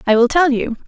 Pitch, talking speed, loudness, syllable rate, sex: 260 Hz, 275 wpm, -15 LUFS, 6.1 syllables/s, female